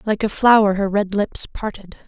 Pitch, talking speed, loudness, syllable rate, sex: 205 Hz, 200 wpm, -18 LUFS, 5.0 syllables/s, female